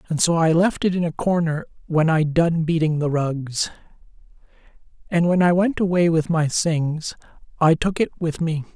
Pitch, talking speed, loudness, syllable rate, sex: 165 Hz, 185 wpm, -20 LUFS, 4.7 syllables/s, male